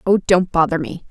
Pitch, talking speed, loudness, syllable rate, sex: 180 Hz, 215 wpm, -17 LUFS, 5.2 syllables/s, female